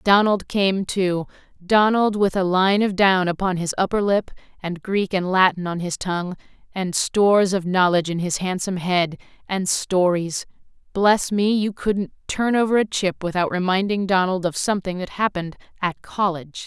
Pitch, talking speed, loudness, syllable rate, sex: 190 Hz, 165 wpm, -21 LUFS, 4.9 syllables/s, female